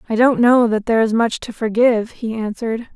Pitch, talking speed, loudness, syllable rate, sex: 230 Hz, 225 wpm, -17 LUFS, 5.8 syllables/s, female